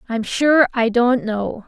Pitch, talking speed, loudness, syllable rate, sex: 240 Hz, 180 wpm, -17 LUFS, 3.5 syllables/s, female